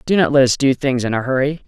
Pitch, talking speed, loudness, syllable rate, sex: 135 Hz, 320 wpm, -16 LUFS, 6.5 syllables/s, male